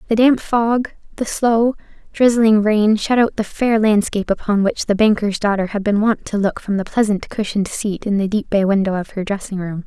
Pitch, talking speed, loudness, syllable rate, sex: 210 Hz, 220 wpm, -17 LUFS, 5.2 syllables/s, female